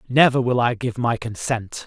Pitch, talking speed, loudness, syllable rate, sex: 120 Hz, 195 wpm, -21 LUFS, 4.7 syllables/s, male